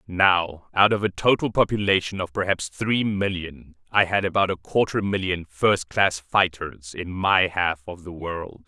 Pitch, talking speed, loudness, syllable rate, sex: 95 Hz, 165 wpm, -23 LUFS, 4.2 syllables/s, male